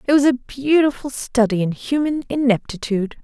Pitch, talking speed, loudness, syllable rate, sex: 255 Hz, 150 wpm, -19 LUFS, 5.2 syllables/s, female